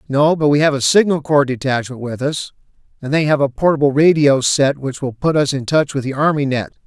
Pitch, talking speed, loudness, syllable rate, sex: 140 Hz, 235 wpm, -16 LUFS, 5.6 syllables/s, male